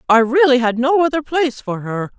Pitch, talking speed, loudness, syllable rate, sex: 260 Hz, 220 wpm, -16 LUFS, 5.6 syllables/s, female